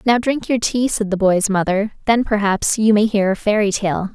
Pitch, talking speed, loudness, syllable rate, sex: 210 Hz, 230 wpm, -17 LUFS, 4.9 syllables/s, female